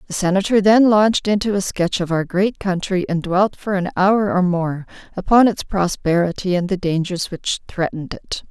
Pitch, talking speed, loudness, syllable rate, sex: 190 Hz, 190 wpm, -18 LUFS, 5.0 syllables/s, female